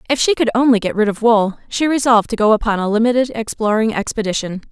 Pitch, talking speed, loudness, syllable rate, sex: 225 Hz, 215 wpm, -16 LUFS, 6.6 syllables/s, female